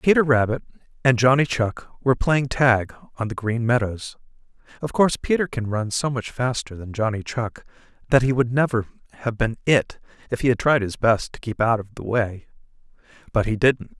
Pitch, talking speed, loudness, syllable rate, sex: 120 Hz, 195 wpm, -22 LUFS, 5.2 syllables/s, male